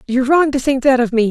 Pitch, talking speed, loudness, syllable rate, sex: 260 Hz, 320 wpm, -14 LUFS, 6.7 syllables/s, female